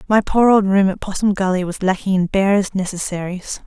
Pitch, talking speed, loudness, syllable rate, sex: 195 Hz, 195 wpm, -18 LUFS, 5.5 syllables/s, female